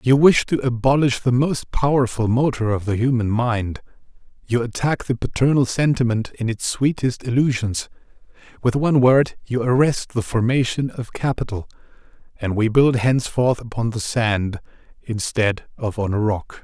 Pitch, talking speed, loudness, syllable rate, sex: 120 Hz, 150 wpm, -20 LUFS, 4.8 syllables/s, male